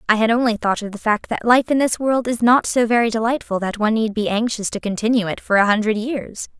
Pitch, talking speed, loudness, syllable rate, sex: 225 Hz, 265 wpm, -19 LUFS, 6.0 syllables/s, female